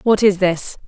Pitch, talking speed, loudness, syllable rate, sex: 195 Hz, 205 wpm, -17 LUFS, 4.4 syllables/s, female